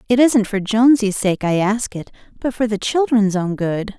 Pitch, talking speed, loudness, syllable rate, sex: 215 Hz, 210 wpm, -17 LUFS, 4.8 syllables/s, female